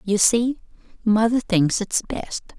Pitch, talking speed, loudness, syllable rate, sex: 215 Hz, 140 wpm, -21 LUFS, 3.7 syllables/s, female